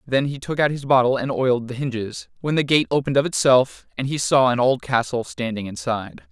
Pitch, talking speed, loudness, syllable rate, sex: 130 Hz, 230 wpm, -21 LUFS, 5.8 syllables/s, male